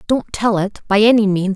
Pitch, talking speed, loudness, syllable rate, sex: 205 Hz, 230 wpm, -16 LUFS, 5.0 syllables/s, female